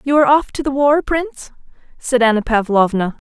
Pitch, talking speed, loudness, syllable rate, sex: 255 Hz, 185 wpm, -15 LUFS, 5.6 syllables/s, female